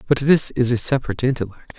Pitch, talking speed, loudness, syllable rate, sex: 125 Hz, 200 wpm, -19 LUFS, 6.9 syllables/s, male